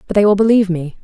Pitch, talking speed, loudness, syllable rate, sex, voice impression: 195 Hz, 290 wpm, -14 LUFS, 8.4 syllables/s, female, very feminine, slightly young, very adult-like, slightly thin, slightly relaxed, slightly weak, dark, hard, very clear, very fluent, slightly cute, cool, very intellectual, very refreshing, sincere, calm, very friendly, very reassuring, very elegant, slightly wild, very sweet, slightly lively, kind, slightly intense, modest, light